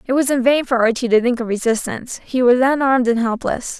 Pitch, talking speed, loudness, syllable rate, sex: 245 Hz, 235 wpm, -17 LUFS, 6.1 syllables/s, female